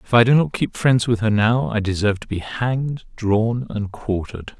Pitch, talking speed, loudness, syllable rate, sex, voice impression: 115 Hz, 220 wpm, -20 LUFS, 5.1 syllables/s, male, very masculine, very middle-aged, very thick, tensed, very powerful, bright, soft, slightly muffled, fluent, slightly raspy, cool, very intellectual, slightly refreshing, sincere, very calm, very mature, friendly, reassuring, very unique, slightly elegant, very wild, lively, very kind, modest